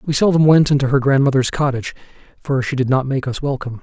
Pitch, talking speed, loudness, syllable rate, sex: 135 Hz, 220 wpm, -17 LUFS, 6.6 syllables/s, male